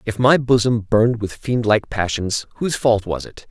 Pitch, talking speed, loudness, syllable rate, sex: 110 Hz, 205 wpm, -19 LUFS, 4.9 syllables/s, male